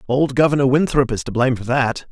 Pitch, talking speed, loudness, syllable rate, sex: 130 Hz, 225 wpm, -18 LUFS, 6.3 syllables/s, male